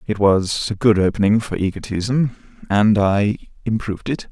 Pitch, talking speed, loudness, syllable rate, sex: 105 Hz, 155 wpm, -19 LUFS, 4.8 syllables/s, male